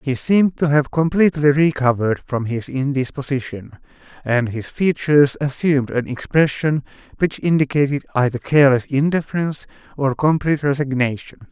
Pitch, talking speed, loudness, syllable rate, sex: 140 Hz, 120 wpm, -18 LUFS, 5.4 syllables/s, male